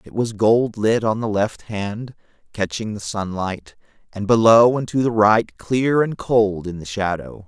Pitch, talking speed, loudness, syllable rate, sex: 105 Hz, 185 wpm, -19 LUFS, 4.1 syllables/s, male